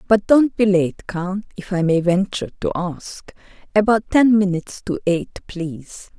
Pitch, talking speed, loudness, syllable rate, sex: 190 Hz, 165 wpm, -19 LUFS, 4.5 syllables/s, female